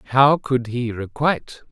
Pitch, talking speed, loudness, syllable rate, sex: 130 Hz, 140 wpm, -20 LUFS, 4.3 syllables/s, male